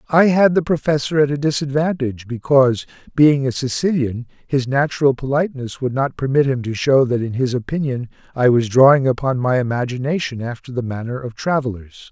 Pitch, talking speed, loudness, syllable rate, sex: 135 Hz, 175 wpm, -18 LUFS, 5.6 syllables/s, male